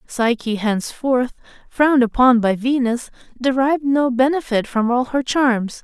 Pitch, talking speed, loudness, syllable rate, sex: 250 Hz, 135 wpm, -18 LUFS, 4.5 syllables/s, female